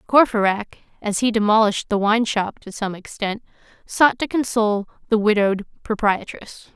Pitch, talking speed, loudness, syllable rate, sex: 215 Hz, 140 wpm, -20 LUFS, 5.3 syllables/s, female